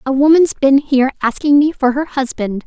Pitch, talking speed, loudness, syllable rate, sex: 275 Hz, 205 wpm, -14 LUFS, 5.5 syllables/s, female